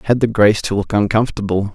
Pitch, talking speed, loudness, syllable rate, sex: 105 Hz, 240 wpm, -16 LUFS, 7.0 syllables/s, male